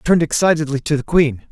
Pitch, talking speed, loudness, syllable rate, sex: 150 Hz, 235 wpm, -17 LUFS, 7.2 syllables/s, male